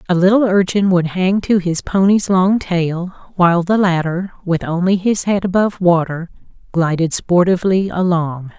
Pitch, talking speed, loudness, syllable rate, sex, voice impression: 180 Hz, 155 wpm, -16 LUFS, 4.7 syllables/s, female, very feminine, very middle-aged, thin, tensed, weak, bright, very soft, very clear, very fluent, very cute, slightly cool, very intellectual, very refreshing, very sincere, very calm, very friendly, very reassuring, very unique, very elegant, slightly wild, very sweet, lively, very kind, modest, light